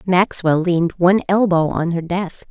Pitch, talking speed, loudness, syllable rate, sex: 175 Hz, 170 wpm, -17 LUFS, 4.8 syllables/s, female